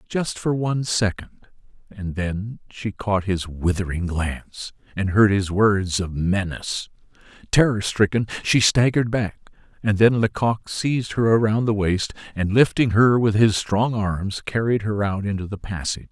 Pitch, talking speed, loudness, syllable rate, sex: 105 Hz, 160 wpm, -21 LUFS, 4.6 syllables/s, male